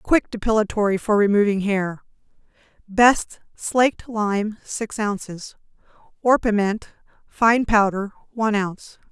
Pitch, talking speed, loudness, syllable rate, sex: 210 Hz, 90 wpm, -21 LUFS, 4.3 syllables/s, female